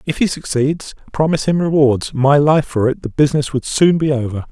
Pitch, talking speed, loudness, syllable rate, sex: 145 Hz, 215 wpm, -16 LUFS, 5.5 syllables/s, male